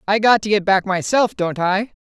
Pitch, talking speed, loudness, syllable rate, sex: 200 Hz, 235 wpm, -17 LUFS, 5.0 syllables/s, female